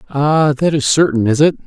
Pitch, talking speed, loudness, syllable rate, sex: 145 Hz, 215 wpm, -14 LUFS, 5.1 syllables/s, male